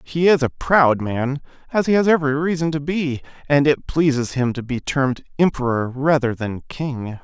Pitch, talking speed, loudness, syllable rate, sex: 140 Hz, 190 wpm, -20 LUFS, 4.9 syllables/s, male